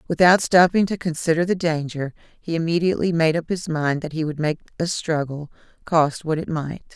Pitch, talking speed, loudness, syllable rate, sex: 165 Hz, 190 wpm, -21 LUFS, 5.4 syllables/s, female